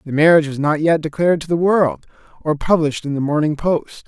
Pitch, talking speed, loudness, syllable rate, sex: 155 Hz, 220 wpm, -17 LUFS, 6.2 syllables/s, male